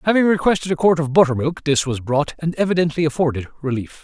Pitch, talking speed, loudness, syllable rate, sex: 155 Hz, 195 wpm, -19 LUFS, 6.5 syllables/s, male